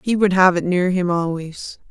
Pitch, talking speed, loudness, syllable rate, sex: 180 Hz, 220 wpm, -18 LUFS, 4.7 syllables/s, female